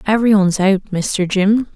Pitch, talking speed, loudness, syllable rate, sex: 200 Hz, 170 wpm, -15 LUFS, 5.1 syllables/s, female